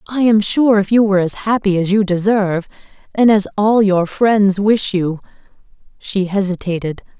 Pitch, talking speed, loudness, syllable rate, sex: 200 Hz, 165 wpm, -15 LUFS, 4.8 syllables/s, female